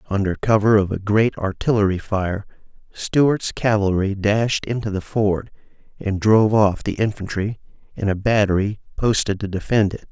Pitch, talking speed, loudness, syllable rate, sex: 105 Hz, 150 wpm, -20 LUFS, 4.7 syllables/s, male